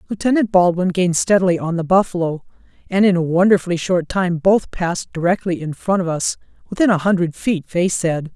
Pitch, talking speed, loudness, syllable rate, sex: 180 Hz, 180 wpm, -18 LUFS, 5.7 syllables/s, female